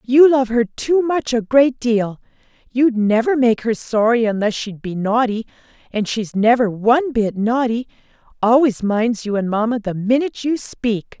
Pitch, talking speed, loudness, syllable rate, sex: 235 Hz, 165 wpm, -18 LUFS, 4.5 syllables/s, female